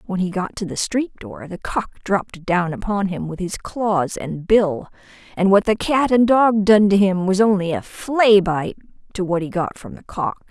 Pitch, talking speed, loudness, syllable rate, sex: 195 Hz, 225 wpm, -19 LUFS, 4.5 syllables/s, female